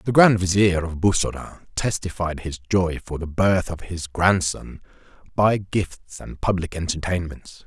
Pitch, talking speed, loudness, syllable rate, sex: 90 Hz, 150 wpm, -22 LUFS, 4.2 syllables/s, male